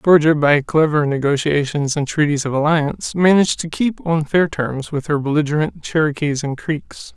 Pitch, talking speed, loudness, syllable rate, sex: 150 Hz, 170 wpm, -18 LUFS, 5.0 syllables/s, male